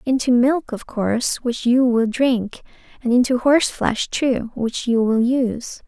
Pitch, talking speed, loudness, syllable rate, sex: 245 Hz, 165 wpm, -19 LUFS, 4.2 syllables/s, female